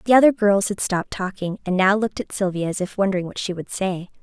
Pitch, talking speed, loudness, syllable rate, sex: 195 Hz, 255 wpm, -21 LUFS, 6.4 syllables/s, female